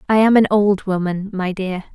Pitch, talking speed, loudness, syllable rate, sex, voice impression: 195 Hz, 215 wpm, -17 LUFS, 4.9 syllables/s, female, very gender-neutral, slightly adult-like, thin, slightly relaxed, weak, slightly dark, very soft, very clear, fluent, cute, intellectual, very refreshing, sincere, very calm, very friendly, very reassuring, unique, very elegant, sweet, slightly lively, very kind, modest